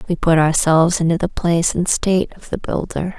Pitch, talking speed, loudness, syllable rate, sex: 170 Hz, 205 wpm, -17 LUFS, 5.7 syllables/s, female